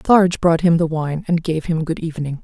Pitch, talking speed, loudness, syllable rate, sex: 165 Hz, 245 wpm, -18 LUFS, 6.0 syllables/s, female